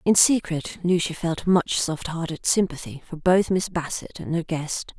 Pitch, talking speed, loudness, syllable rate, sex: 170 Hz, 180 wpm, -23 LUFS, 4.5 syllables/s, female